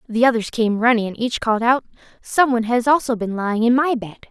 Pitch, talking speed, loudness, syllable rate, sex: 235 Hz, 235 wpm, -19 LUFS, 6.1 syllables/s, female